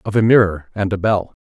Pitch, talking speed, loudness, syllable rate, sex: 100 Hz, 250 wpm, -16 LUFS, 5.7 syllables/s, male